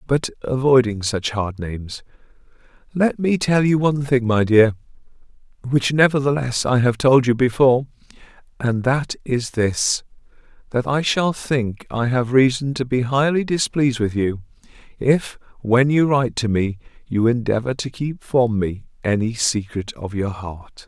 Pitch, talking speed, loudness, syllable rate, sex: 125 Hz, 155 wpm, -19 LUFS, 3.9 syllables/s, male